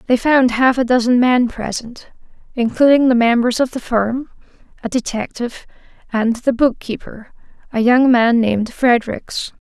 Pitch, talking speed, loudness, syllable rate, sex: 240 Hz, 145 wpm, -16 LUFS, 4.7 syllables/s, female